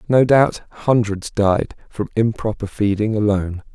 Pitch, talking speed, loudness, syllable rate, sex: 110 Hz, 130 wpm, -19 LUFS, 4.2 syllables/s, male